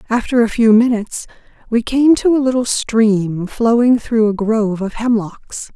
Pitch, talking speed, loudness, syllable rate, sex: 225 Hz, 165 wpm, -15 LUFS, 4.5 syllables/s, female